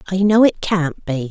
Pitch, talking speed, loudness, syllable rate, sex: 180 Hz, 230 wpm, -16 LUFS, 4.3 syllables/s, female